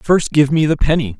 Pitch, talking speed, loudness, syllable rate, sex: 150 Hz, 250 wpm, -15 LUFS, 5.2 syllables/s, male